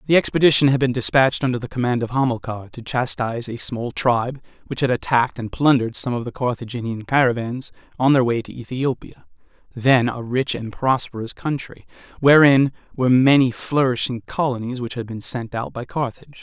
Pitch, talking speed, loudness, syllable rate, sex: 125 Hz, 175 wpm, -20 LUFS, 5.7 syllables/s, male